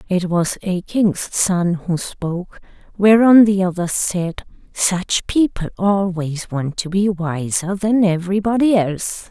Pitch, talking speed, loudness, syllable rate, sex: 185 Hz, 135 wpm, -18 LUFS, 3.8 syllables/s, female